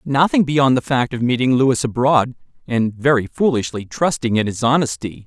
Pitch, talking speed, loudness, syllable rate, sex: 130 Hz, 170 wpm, -18 LUFS, 5.1 syllables/s, male